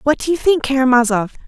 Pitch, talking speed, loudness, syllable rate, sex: 265 Hz, 205 wpm, -15 LUFS, 6.4 syllables/s, female